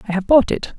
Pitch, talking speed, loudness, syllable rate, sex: 220 Hz, 305 wpm, -16 LUFS, 6.6 syllables/s, female